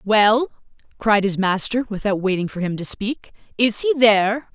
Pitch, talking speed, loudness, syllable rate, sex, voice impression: 215 Hz, 170 wpm, -19 LUFS, 4.7 syllables/s, female, feminine, adult-like, fluent, slightly intellectual, slightly strict